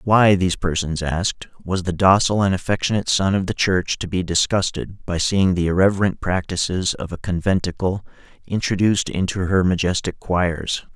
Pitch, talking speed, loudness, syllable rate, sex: 90 Hz, 160 wpm, -20 LUFS, 5.3 syllables/s, male